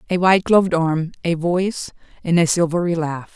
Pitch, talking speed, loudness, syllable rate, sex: 170 Hz, 180 wpm, -18 LUFS, 5.5 syllables/s, female